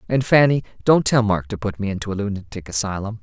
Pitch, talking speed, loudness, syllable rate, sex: 105 Hz, 225 wpm, -20 LUFS, 6.3 syllables/s, male